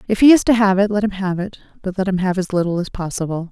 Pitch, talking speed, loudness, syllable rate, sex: 195 Hz, 310 wpm, -17 LUFS, 6.8 syllables/s, female